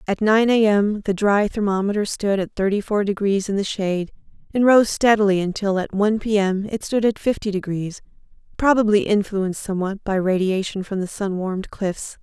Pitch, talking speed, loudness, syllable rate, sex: 200 Hz, 185 wpm, -20 LUFS, 5.3 syllables/s, female